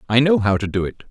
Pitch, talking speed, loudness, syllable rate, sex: 115 Hz, 325 wpm, -18 LUFS, 6.8 syllables/s, male